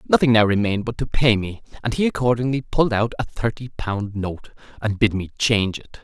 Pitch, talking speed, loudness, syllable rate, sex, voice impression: 110 Hz, 210 wpm, -21 LUFS, 5.9 syllables/s, male, masculine, adult-like, slightly soft, slightly sincere, friendly, kind